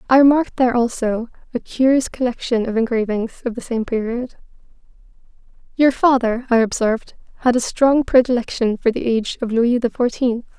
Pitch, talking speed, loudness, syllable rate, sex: 240 Hz, 160 wpm, -18 LUFS, 5.5 syllables/s, female